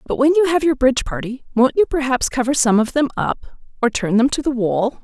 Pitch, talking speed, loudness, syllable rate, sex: 260 Hz, 250 wpm, -18 LUFS, 5.6 syllables/s, female